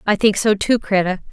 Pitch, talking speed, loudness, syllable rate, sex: 205 Hz, 225 wpm, -17 LUFS, 5.5 syllables/s, female